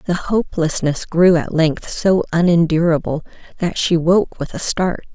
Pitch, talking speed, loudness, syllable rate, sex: 170 Hz, 150 wpm, -17 LUFS, 4.5 syllables/s, female